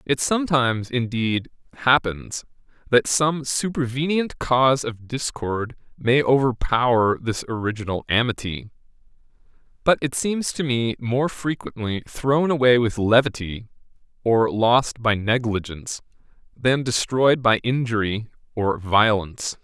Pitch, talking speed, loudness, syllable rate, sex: 120 Hz, 110 wpm, -21 LUFS, 4.2 syllables/s, male